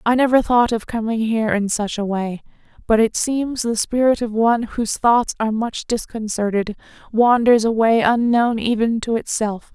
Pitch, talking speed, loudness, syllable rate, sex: 225 Hz, 170 wpm, -18 LUFS, 4.9 syllables/s, female